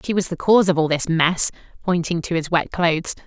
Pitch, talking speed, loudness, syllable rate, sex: 170 Hz, 240 wpm, -20 LUFS, 5.9 syllables/s, female